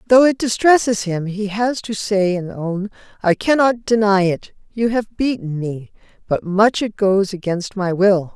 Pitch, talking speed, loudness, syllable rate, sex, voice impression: 205 Hz, 180 wpm, -18 LUFS, 4.2 syllables/s, female, very feminine, very middle-aged, thin, tensed, slightly powerful, slightly bright, slightly soft, clear, fluent, slightly cute, intellectual, refreshing, slightly sincere, calm, friendly, reassuring, very unique, very elegant, slightly wild, very sweet, lively, slightly kind, slightly strict, slightly intense, sharp